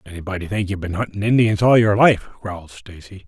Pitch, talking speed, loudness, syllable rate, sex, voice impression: 100 Hz, 200 wpm, -18 LUFS, 5.9 syllables/s, male, very masculine, very adult-like, old, very thick, slightly relaxed, slightly weak, slightly dark, hard, very muffled, raspy, very cool, very intellectual, sincere, very calm, very mature, friendly, reassuring, slightly unique, elegant, slightly sweet, slightly lively, slightly strict, slightly intense